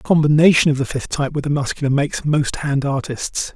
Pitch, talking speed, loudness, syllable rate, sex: 140 Hz, 220 wpm, -18 LUFS, 6.0 syllables/s, male